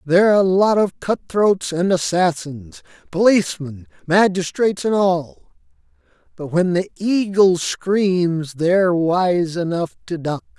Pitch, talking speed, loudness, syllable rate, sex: 175 Hz, 110 wpm, -18 LUFS, 3.8 syllables/s, male